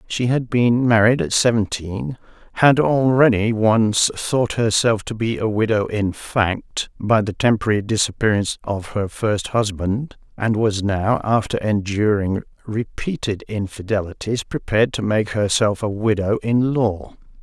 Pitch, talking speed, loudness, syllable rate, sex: 110 Hz, 140 wpm, -19 LUFS, 4.3 syllables/s, male